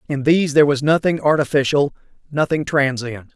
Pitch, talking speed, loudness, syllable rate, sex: 145 Hz, 145 wpm, -18 LUFS, 5.7 syllables/s, male